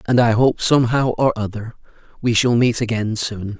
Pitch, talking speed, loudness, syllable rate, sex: 115 Hz, 185 wpm, -18 LUFS, 5.2 syllables/s, male